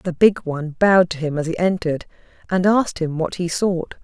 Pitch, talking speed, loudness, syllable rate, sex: 175 Hz, 225 wpm, -19 LUFS, 5.7 syllables/s, female